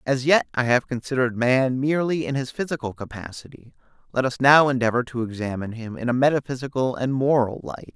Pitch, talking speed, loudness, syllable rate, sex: 130 Hz, 180 wpm, -22 LUFS, 6.0 syllables/s, male